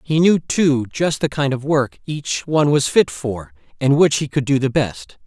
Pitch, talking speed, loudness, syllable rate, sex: 145 Hz, 230 wpm, -18 LUFS, 4.4 syllables/s, male